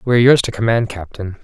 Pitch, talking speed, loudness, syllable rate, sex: 110 Hz, 210 wpm, -15 LUFS, 6.0 syllables/s, male